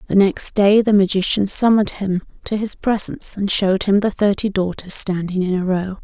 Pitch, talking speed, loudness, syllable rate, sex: 195 Hz, 200 wpm, -18 LUFS, 5.3 syllables/s, female